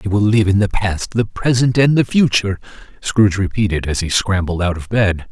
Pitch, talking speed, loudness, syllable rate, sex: 100 Hz, 215 wpm, -16 LUFS, 5.4 syllables/s, male